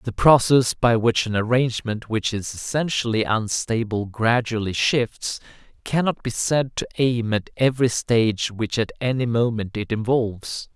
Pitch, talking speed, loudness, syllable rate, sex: 115 Hz, 145 wpm, -22 LUFS, 4.5 syllables/s, male